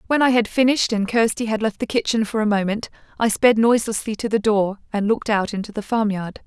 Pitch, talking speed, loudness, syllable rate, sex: 215 Hz, 230 wpm, -20 LUFS, 6.2 syllables/s, female